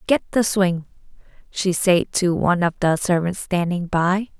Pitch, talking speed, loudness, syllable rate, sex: 180 Hz, 165 wpm, -20 LUFS, 4.3 syllables/s, female